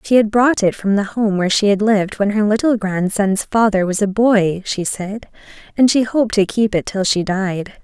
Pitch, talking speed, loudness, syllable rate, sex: 205 Hz, 230 wpm, -16 LUFS, 5.0 syllables/s, female